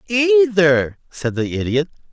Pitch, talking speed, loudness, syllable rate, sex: 180 Hz, 115 wpm, -17 LUFS, 3.7 syllables/s, male